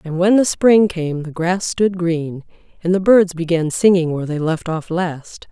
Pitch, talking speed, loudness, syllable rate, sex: 175 Hz, 205 wpm, -17 LUFS, 4.4 syllables/s, female